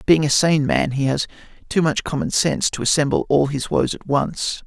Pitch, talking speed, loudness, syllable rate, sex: 145 Hz, 220 wpm, -19 LUFS, 5.1 syllables/s, male